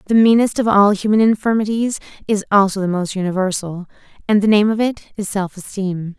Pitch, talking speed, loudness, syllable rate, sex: 200 Hz, 185 wpm, -17 LUFS, 5.7 syllables/s, female